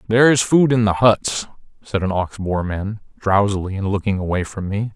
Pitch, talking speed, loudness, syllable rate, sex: 105 Hz, 205 wpm, -19 LUFS, 5.1 syllables/s, male